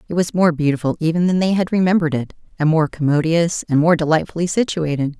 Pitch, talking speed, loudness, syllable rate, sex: 165 Hz, 195 wpm, -18 LUFS, 6.4 syllables/s, female